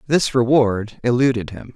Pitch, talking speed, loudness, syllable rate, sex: 120 Hz, 135 wpm, -18 LUFS, 4.6 syllables/s, male